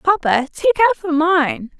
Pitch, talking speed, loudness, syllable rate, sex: 335 Hz, 165 wpm, -16 LUFS, 5.4 syllables/s, female